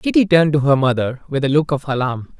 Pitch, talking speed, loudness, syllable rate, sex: 145 Hz, 250 wpm, -17 LUFS, 6.2 syllables/s, male